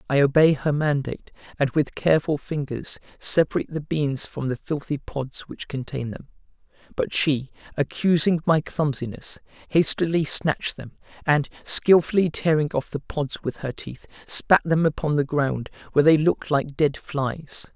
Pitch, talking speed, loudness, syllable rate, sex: 145 Hz, 155 wpm, -23 LUFS, 4.7 syllables/s, male